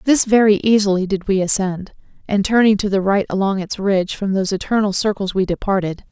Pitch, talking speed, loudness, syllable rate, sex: 200 Hz, 195 wpm, -17 LUFS, 5.9 syllables/s, female